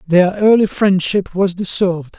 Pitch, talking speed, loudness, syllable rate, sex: 190 Hz, 135 wpm, -15 LUFS, 4.4 syllables/s, male